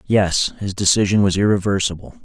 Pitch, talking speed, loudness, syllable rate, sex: 100 Hz, 135 wpm, -18 LUFS, 5.5 syllables/s, male